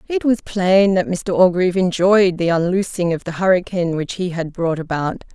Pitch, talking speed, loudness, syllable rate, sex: 180 Hz, 190 wpm, -18 LUFS, 5.1 syllables/s, female